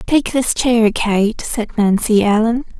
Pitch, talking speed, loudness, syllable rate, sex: 225 Hz, 150 wpm, -15 LUFS, 3.6 syllables/s, female